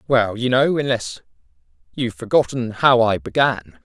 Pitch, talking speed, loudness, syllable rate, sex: 115 Hz, 140 wpm, -19 LUFS, 4.8 syllables/s, male